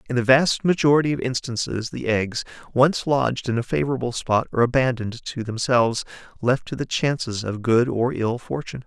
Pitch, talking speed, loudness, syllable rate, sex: 125 Hz, 185 wpm, -22 LUFS, 5.7 syllables/s, male